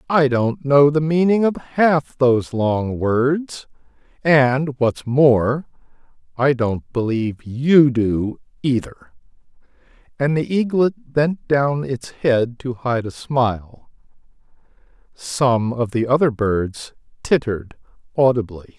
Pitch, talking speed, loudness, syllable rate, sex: 130 Hz, 120 wpm, -19 LUFS, 3.5 syllables/s, male